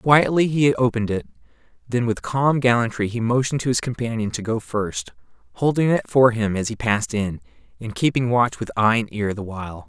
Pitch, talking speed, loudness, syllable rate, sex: 115 Hz, 200 wpm, -21 LUFS, 5.5 syllables/s, male